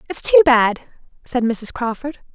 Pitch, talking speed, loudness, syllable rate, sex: 250 Hz, 155 wpm, -17 LUFS, 4.5 syllables/s, female